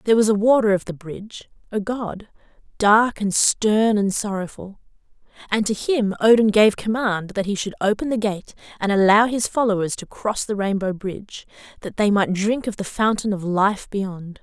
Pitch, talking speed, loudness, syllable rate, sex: 205 Hz, 185 wpm, -20 LUFS, 4.9 syllables/s, female